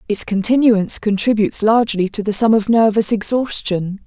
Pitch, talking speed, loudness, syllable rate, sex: 215 Hz, 150 wpm, -16 LUFS, 5.5 syllables/s, female